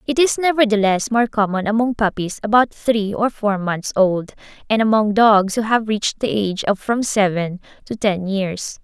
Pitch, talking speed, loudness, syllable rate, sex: 210 Hz, 185 wpm, -18 LUFS, 4.8 syllables/s, female